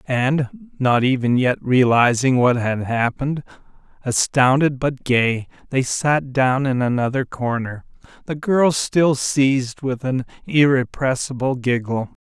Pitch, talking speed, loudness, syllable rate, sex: 130 Hz, 125 wpm, -19 LUFS, 4.0 syllables/s, male